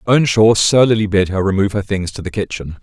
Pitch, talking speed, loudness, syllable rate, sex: 100 Hz, 215 wpm, -15 LUFS, 6.1 syllables/s, male